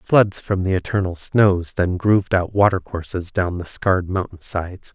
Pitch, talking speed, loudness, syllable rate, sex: 95 Hz, 160 wpm, -20 LUFS, 4.7 syllables/s, male